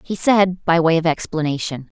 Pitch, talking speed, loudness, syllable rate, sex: 165 Hz, 180 wpm, -18 LUFS, 4.9 syllables/s, female